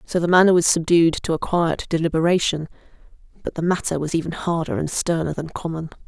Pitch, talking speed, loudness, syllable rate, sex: 165 Hz, 190 wpm, -20 LUFS, 6.0 syllables/s, female